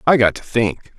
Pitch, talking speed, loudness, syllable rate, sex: 120 Hz, 245 wpm, -18 LUFS, 5.8 syllables/s, male